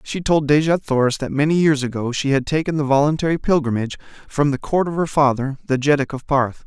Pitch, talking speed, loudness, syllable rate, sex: 145 Hz, 215 wpm, -19 LUFS, 6.0 syllables/s, male